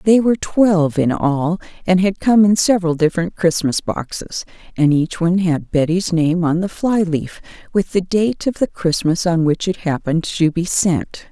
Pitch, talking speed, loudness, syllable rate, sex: 175 Hz, 190 wpm, -17 LUFS, 4.8 syllables/s, female